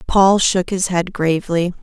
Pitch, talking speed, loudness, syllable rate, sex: 180 Hz, 165 wpm, -17 LUFS, 4.3 syllables/s, female